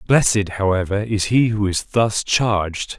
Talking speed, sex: 160 wpm, male